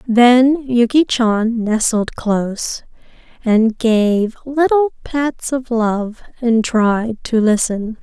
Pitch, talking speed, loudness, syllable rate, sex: 235 Hz, 110 wpm, -16 LUFS, 2.9 syllables/s, female